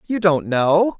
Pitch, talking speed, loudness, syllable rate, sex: 175 Hz, 180 wpm, -17 LUFS, 3.5 syllables/s, male